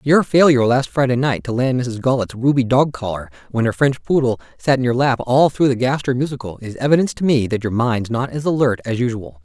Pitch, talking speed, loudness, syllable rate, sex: 125 Hz, 240 wpm, -18 LUFS, 6.1 syllables/s, male